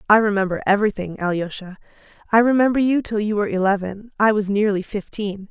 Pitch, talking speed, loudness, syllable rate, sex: 205 Hz, 165 wpm, -20 LUFS, 6.2 syllables/s, female